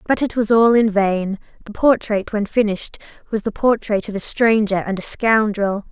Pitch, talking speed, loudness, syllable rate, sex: 215 Hz, 195 wpm, -18 LUFS, 4.9 syllables/s, female